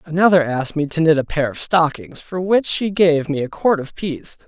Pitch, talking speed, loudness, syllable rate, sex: 160 Hz, 240 wpm, -18 LUFS, 5.1 syllables/s, male